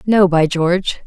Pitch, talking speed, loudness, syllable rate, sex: 180 Hz, 170 wpm, -15 LUFS, 4.4 syllables/s, female